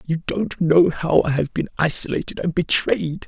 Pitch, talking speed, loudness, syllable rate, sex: 165 Hz, 185 wpm, -20 LUFS, 4.6 syllables/s, male